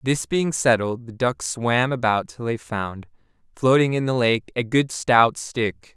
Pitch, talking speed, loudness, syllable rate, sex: 120 Hz, 180 wpm, -21 LUFS, 4.0 syllables/s, male